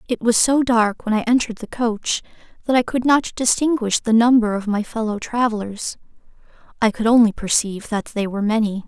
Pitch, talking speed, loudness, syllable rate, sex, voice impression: 225 Hz, 190 wpm, -19 LUFS, 5.6 syllables/s, female, very feminine, young, very thin, tensed, slightly weak, bright, soft, very clear, fluent, very cute, intellectual, very refreshing, sincere, slightly calm, very friendly, very reassuring, unique, elegant, slightly sweet, lively, slightly strict, slightly intense, slightly sharp